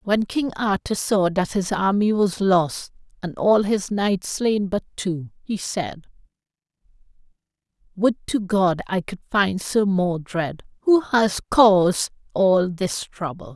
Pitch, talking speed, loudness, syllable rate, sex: 195 Hz, 140 wpm, -21 LUFS, 3.6 syllables/s, female